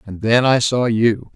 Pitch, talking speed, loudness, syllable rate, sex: 115 Hz, 220 wpm, -16 LUFS, 4.1 syllables/s, male